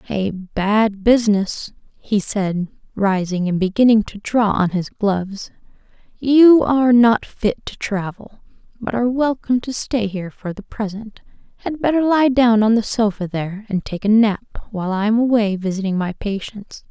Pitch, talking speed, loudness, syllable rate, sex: 215 Hz, 165 wpm, -18 LUFS, 4.6 syllables/s, female